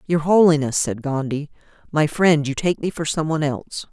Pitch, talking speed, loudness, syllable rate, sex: 150 Hz, 200 wpm, -20 LUFS, 5.4 syllables/s, female